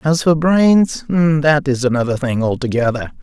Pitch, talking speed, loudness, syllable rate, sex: 145 Hz, 150 wpm, -15 LUFS, 4.3 syllables/s, male